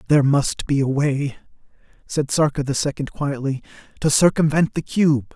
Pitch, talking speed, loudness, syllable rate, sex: 145 Hz, 155 wpm, -20 LUFS, 5.2 syllables/s, male